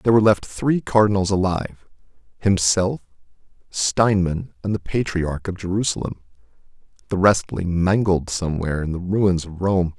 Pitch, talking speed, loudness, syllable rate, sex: 95 Hz, 140 wpm, -21 LUFS, 5.0 syllables/s, male